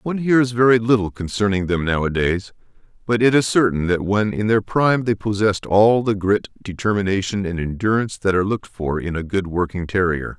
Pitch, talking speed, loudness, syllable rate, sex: 100 Hz, 190 wpm, -19 LUFS, 5.7 syllables/s, male